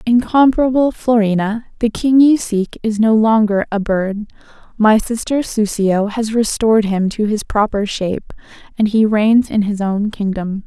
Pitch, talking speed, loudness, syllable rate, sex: 215 Hz, 160 wpm, -15 LUFS, 4.5 syllables/s, female